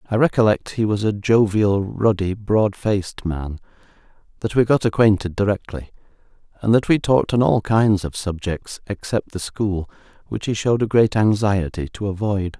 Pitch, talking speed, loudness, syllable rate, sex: 100 Hz, 165 wpm, -20 LUFS, 4.9 syllables/s, male